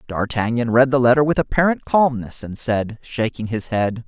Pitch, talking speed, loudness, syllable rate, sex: 120 Hz, 175 wpm, -19 LUFS, 4.9 syllables/s, male